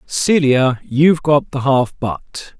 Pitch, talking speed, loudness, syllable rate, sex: 140 Hz, 140 wpm, -15 LUFS, 3.4 syllables/s, male